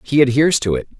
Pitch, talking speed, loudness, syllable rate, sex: 125 Hz, 240 wpm, -16 LUFS, 7.4 syllables/s, male